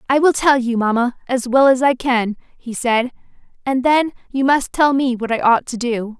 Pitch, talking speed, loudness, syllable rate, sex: 255 Hz, 225 wpm, -17 LUFS, 4.7 syllables/s, female